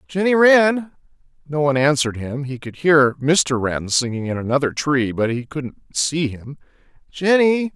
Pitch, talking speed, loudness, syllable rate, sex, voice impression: 145 Hz, 160 wpm, -18 LUFS, 4.6 syllables/s, male, masculine, adult-like, tensed, slightly friendly, slightly unique